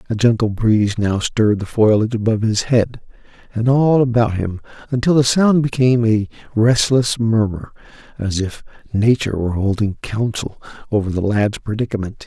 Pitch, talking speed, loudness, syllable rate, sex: 110 Hz, 150 wpm, -17 LUFS, 5.3 syllables/s, male